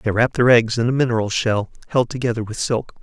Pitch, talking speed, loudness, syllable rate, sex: 120 Hz, 240 wpm, -19 LUFS, 5.8 syllables/s, male